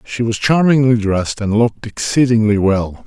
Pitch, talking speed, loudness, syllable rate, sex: 115 Hz, 155 wpm, -15 LUFS, 5.2 syllables/s, male